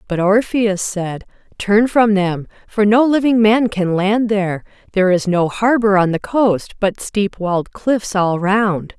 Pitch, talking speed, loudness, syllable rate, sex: 200 Hz, 175 wpm, -16 LUFS, 4.0 syllables/s, female